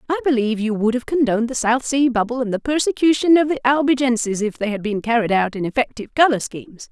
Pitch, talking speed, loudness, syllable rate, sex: 245 Hz, 225 wpm, -19 LUFS, 6.5 syllables/s, female